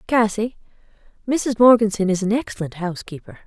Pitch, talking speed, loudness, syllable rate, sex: 210 Hz, 120 wpm, -19 LUFS, 5.9 syllables/s, female